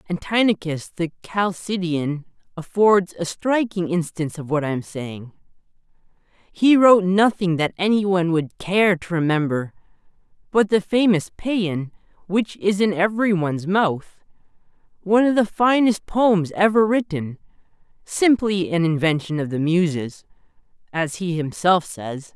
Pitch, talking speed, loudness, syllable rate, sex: 180 Hz, 135 wpm, -20 LUFS, 4.4 syllables/s, male